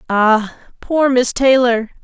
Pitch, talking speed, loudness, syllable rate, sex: 245 Hz, 120 wpm, -14 LUFS, 3.4 syllables/s, female